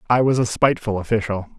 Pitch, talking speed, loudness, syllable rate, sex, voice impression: 110 Hz, 190 wpm, -20 LUFS, 6.8 syllables/s, male, very masculine, very adult-like, middle-aged, very thick, tensed, slightly powerful, very bright, soft, very clear, fluent, cool, very intellectual, refreshing, very sincere, calm, mature, very friendly, very reassuring, unique, very elegant, sweet, very lively, very kind, slightly modest, light